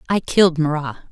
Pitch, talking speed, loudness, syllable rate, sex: 160 Hz, 160 wpm, -18 LUFS, 6.3 syllables/s, female